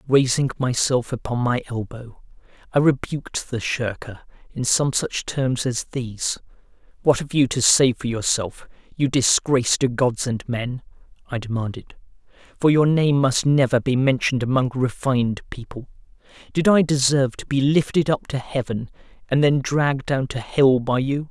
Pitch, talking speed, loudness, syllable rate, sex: 130 Hz, 160 wpm, -21 LUFS, 4.7 syllables/s, male